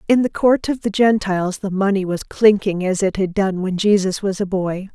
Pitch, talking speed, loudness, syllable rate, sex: 195 Hz, 230 wpm, -18 LUFS, 5.1 syllables/s, female